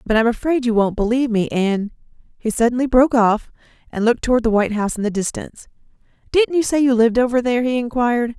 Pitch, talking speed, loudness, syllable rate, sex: 235 Hz, 205 wpm, -18 LUFS, 7.0 syllables/s, female